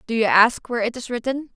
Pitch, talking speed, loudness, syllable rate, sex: 235 Hz, 270 wpm, -20 LUFS, 6.4 syllables/s, female